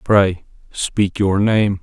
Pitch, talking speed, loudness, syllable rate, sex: 100 Hz, 130 wpm, -17 LUFS, 2.7 syllables/s, male